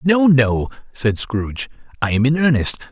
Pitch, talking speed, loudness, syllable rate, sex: 130 Hz, 165 wpm, -17 LUFS, 4.6 syllables/s, male